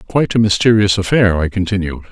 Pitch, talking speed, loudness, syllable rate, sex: 100 Hz, 170 wpm, -14 LUFS, 6.4 syllables/s, male